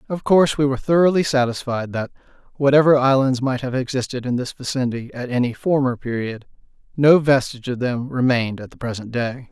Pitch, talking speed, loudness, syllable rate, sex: 130 Hz, 175 wpm, -19 LUFS, 6.0 syllables/s, male